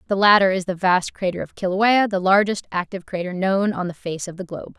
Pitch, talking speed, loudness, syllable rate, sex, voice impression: 190 Hz, 240 wpm, -20 LUFS, 6.0 syllables/s, female, very feminine, young, very thin, tensed, powerful, slightly bright, very hard, very clear, fluent, cute, intellectual, very refreshing, sincere, calm, very friendly, very reassuring, very unique, slightly elegant, wild, lively, strict, slightly intense, slightly sharp